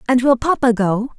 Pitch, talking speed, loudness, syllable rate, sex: 240 Hz, 200 wpm, -16 LUFS, 5.4 syllables/s, female